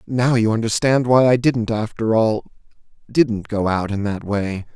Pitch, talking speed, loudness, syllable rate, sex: 115 Hz, 175 wpm, -19 LUFS, 4.3 syllables/s, male